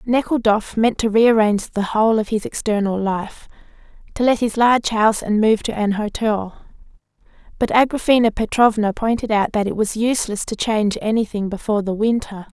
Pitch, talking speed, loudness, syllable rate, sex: 215 Hz, 165 wpm, -18 LUFS, 5.5 syllables/s, female